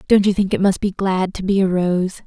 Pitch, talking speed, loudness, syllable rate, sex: 190 Hz, 290 wpm, -18 LUFS, 5.3 syllables/s, female